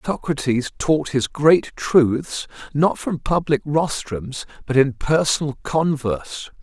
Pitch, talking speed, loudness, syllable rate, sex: 145 Hz, 120 wpm, -20 LUFS, 3.6 syllables/s, male